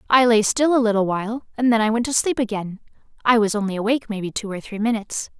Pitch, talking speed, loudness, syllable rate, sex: 225 Hz, 245 wpm, -20 LUFS, 6.8 syllables/s, female